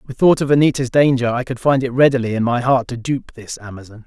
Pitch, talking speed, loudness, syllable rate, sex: 125 Hz, 250 wpm, -16 LUFS, 6.0 syllables/s, male